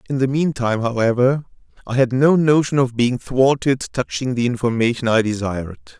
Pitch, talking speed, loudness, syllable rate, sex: 125 Hz, 160 wpm, -18 LUFS, 5.4 syllables/s, male